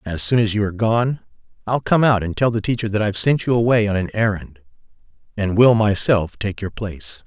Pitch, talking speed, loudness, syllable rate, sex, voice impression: 105 Hz, 225 wpm, -19 LUFS, 5.7 syllables/s, male, very masculine, very adult-like, very middle-aged, thick, very tensed, very powerful, bright, hard, clear, slightly fluent, cool, intellectual, sincere, very calm, very mature, friendly, very reassuring, slightly unique, very wild, slightly sweet, slightly lively, kind